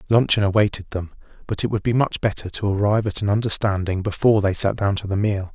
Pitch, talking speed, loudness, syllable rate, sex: 100 Hz, 225 wpm, -20 LUFS, 6.4 syllables/s, male